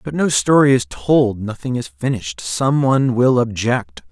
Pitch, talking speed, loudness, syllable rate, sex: 125 Hz, 175 wpm, -17 LUFS, 4.6 syllables/s, male